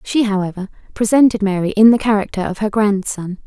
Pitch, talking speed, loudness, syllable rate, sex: 205 Hz, 175 wpm, -16 LUFS, 5.9 syllables/s, female